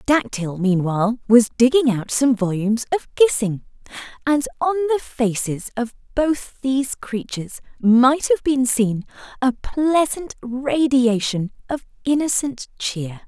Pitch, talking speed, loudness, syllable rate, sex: 245 Hz, 120 wpm, -20 LUFS, 4.3 syllables/s, female